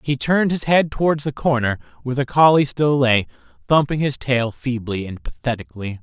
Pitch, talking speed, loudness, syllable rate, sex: 130 Hz, 180 wpm, -19 LUFS, 5.5 syllables/s, male